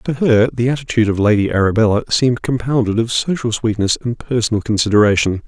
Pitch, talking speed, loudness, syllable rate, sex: 115 Hz, 165 wpm, -16 LUFS, 6.3 syllables/s, male